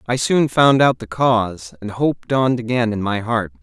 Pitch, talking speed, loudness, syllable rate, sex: 115 Hz, 215 wpm, -18 LUFS, 4.8 syllables/s, male